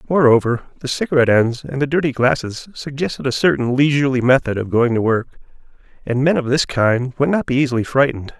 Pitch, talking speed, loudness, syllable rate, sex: 130 Hz, 195 wpm, -17 LUFS, 6.2 syllables/s, male